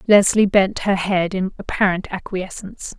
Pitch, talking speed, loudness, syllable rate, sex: 190 Hz, 140 wpm, -19 LUFS, 4.7 syllables/s, female